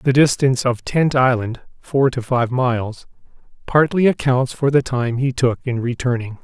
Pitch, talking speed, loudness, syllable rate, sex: 130 Hz, 170 wpm, -18 LUFS, 4.7 syllables/s, male